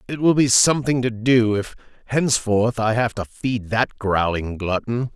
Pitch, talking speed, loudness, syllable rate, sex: 115 Hz, 175 wpm, -20 LUFS, 4.6 syllables/s, male